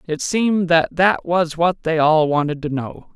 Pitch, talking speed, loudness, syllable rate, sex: 165 Hz, 210 wpm, -18 LUFS, 4.3 syllables/s, male